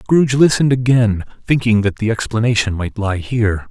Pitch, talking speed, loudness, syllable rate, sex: 115 Hz, 160 wpm, -16 LUFS, 5.5 syllables/s, male